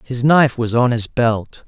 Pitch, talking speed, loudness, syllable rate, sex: 120 Hz, 215 wpm, -16 LUFS, 4.5 syllables/s, male